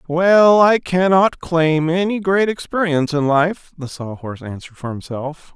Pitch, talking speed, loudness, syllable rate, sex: 165 Hz, 160 wpm, -16 LUFS, 4.5 syllables/s, male